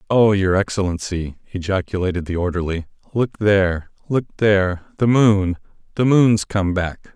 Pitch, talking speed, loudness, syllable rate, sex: 95 Hz, 135 wpm, -19 LUFS, 4.8 syllables/s, male